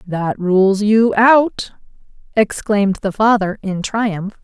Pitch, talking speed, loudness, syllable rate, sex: 205 Hz, 120 wpm, -15 LUFS, 3.3 syllables/s, female